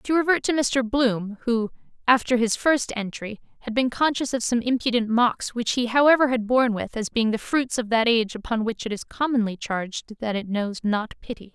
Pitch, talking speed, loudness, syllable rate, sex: 235 Hz, 215 wpm, -23 LUFS, 5.2 syllables/s, female